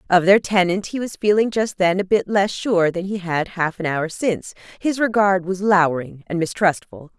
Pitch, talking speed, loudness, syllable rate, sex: 190 Hz, 210 wpm, -19 LUFS, 4.8 syllables/s, female